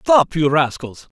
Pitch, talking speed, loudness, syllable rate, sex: 160 Hz, 150 wpm, -17 LUFS, 3.7 syllables/s, male